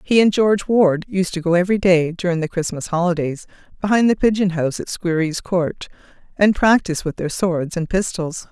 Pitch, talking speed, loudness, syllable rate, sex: 180 Hz, 190 wpm, -19 LUFS, 5.6 syllables/s, female